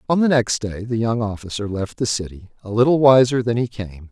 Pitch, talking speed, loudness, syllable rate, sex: 115 Hz, 235 wpm, -19 LUFS, 5.5 syllables/s, male